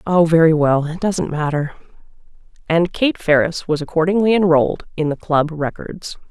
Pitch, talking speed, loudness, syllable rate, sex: 165 Hz, 150 wpm, -17 LUFS, 5.0 syllables/s, female